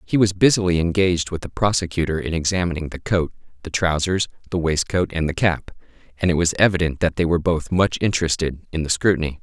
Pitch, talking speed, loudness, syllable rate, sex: 85 Hz, 195 wpm, -20 LUFS, 6.1 syllables/s, male